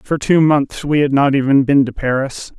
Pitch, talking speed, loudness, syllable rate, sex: 140 Hz, 230 wpm, -15 LUFS, 4.8 syllables/s, male